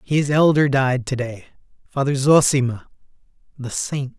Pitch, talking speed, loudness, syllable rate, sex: 135 Hz, 130 wpm, -19 LUFS, 4.3 syllables/s, male